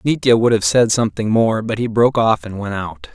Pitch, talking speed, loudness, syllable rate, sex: 110 Hz, 250 wpm, -16 LUFS, 5.6 syllables/s, male